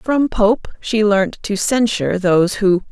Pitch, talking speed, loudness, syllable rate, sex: 210 Hz, 165 wpm, -16 LUFS, 4.1 syllables/s, female